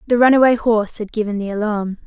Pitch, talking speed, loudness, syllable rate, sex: 220 Hz, 205 wpm, -17 LUFS, 6.5 syllables/s, female